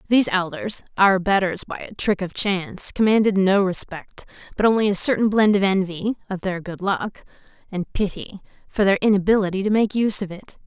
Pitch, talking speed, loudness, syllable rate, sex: 195 Hz, 170 wpm, -20 LUFS, 5.4 syllables/s, female